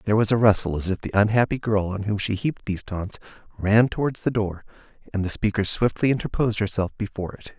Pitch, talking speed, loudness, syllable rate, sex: 105 Hz, 215 wpm, -23 LUFS, 6.4 syllables/s, male